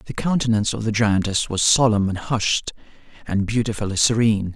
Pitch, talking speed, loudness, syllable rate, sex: 110 Hz, 160 wpm, -20 LUFS, 5.7 syllables/s, male